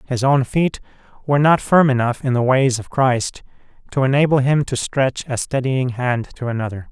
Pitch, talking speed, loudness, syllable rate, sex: 130 Hz, 190 wpm, -18 LUFS, 5.0 syllables/s, male